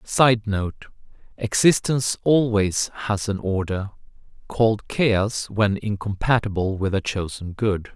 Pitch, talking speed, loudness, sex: 105 Hz, 105 wpm, -22 LUFS, male